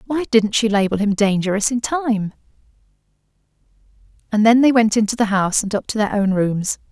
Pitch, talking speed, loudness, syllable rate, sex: 215 Hz, 180 wpm, -18 LUFS, 5.5 syllables/s, female